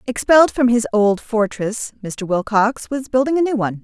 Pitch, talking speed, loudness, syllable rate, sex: 230 Hz, 190 wpm, -17 LUFS, 5.1 syllables/s, female